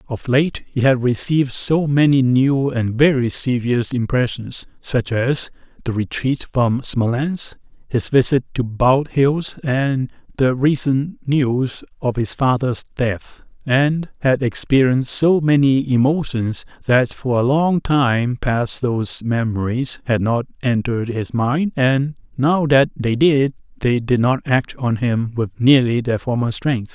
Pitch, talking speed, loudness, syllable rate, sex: 130 Hz, 140 wpm, -18 LUFS, 3.8 syllables/s, male